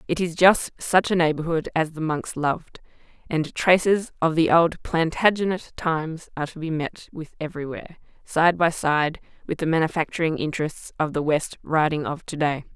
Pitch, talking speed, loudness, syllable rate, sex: 160 Hz, 175 wpm, -23 LUFS, 5.2 syllables/s, female